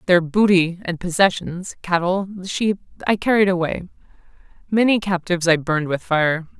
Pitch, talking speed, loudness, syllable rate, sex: 180 Hz, 135 wpm, -19 LUFS, 5.0 syllables/s, female